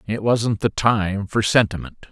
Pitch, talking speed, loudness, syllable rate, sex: 105 Hz, 170 wpm, -20 LUFS, 4.1 syllables/s, male